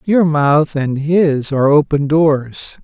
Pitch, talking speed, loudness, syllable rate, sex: 150 Hz, 150 wpm, -14 LUFS, 3.4 syllables/s, male